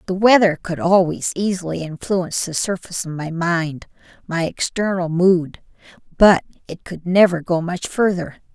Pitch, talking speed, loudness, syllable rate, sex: 175 Hz, 150 wpm, -19 LUFS, 4.6 syllables/s, female